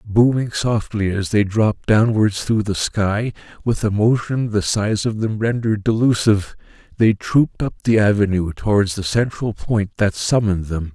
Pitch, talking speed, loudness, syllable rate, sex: 105 Hz, 165 wpm, -19 LUFS, 4.7 syllables/s, male